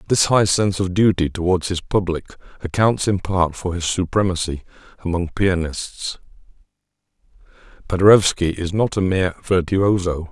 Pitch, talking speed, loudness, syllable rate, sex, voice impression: 90 Hz, 130 wpm, -19 LUFS, 5.0 syllables/s, male, masculine, very adult-like, slightly thick, cool, slightly calm, reassuring, slightly elegant